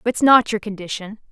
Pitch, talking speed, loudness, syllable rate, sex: 215 Hz, 185 wpm, -18 LUFS, 5.3 syllables/s, female